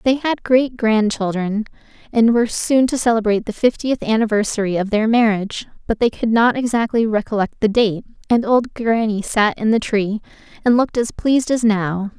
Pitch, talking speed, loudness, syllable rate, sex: 225 Hz, 180 wpm, -18 LUFS, 5.3 syllables/s, female